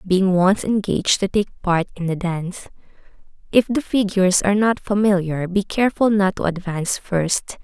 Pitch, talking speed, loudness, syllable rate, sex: 195 Hz, 165 wpm, -19 LUFS, 5.0 syllables/s, female